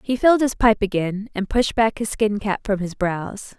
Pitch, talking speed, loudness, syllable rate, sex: 210 Hz, 235 wpm, -21 LUFS, 4.7 syllables/s, female